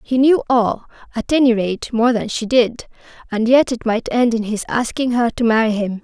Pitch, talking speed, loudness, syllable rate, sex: 235 Hz, 200 wpm, -17 LUFS, 4.9 syllables/s, female